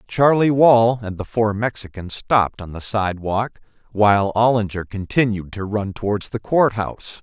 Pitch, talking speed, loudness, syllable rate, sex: 110 Hz, 160 wpm, -19 LUFS, 4.8 syllables/s, male